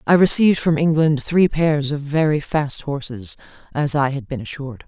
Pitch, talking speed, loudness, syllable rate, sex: 145 Hz, 185 wpm, -19 LUFS, 5.0 syllables/s, female